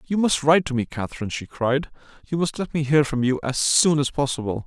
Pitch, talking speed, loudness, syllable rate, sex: 140 Hz, 245 wpm, -22 LUFS, 6.1 syllables/s, male